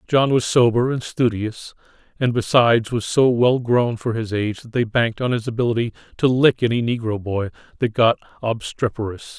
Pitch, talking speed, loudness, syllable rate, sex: 115 Hz, 180 wpm, -20 LUFS, 5.3 syllables/s, male